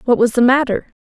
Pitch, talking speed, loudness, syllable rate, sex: 245 Hz, 235 wpm, -15 LUFS, 6.3 syllables/s, female